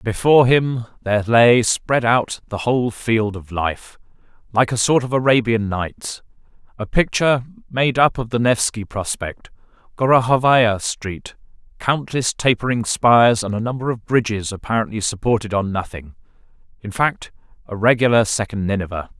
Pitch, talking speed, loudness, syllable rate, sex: 115 Hz, 135 wpm, -18 LUFS, 4.8 syllables/s, male